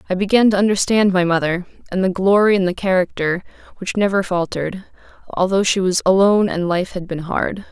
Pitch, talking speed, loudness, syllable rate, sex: 185 Hz, 185 wpm, -17 LUFS, 5.7 syllables/s, female